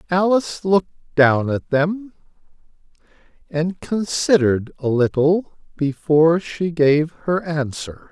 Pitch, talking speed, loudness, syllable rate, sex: 165 Hz, 105 wpm, -19 LUFS, 4.0 syllables/s, male